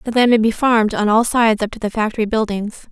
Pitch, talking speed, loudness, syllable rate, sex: 220 Hz, 270 wpm, -16 LUFS, 6.5 syllables/s, female